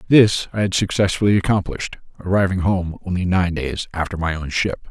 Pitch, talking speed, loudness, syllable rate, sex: 90 Hz, 170 wpm, -20 LUFS, 5.5 syllables/s, male